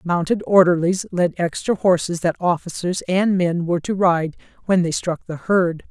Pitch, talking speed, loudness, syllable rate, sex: 175 Hz, 175 wpm, -19 LUFS, 4.7 syllables/s, female